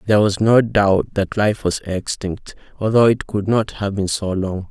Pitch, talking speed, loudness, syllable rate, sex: 100 Hz, 205 wpm, -18 LUFS, 4.4 syllables/s, male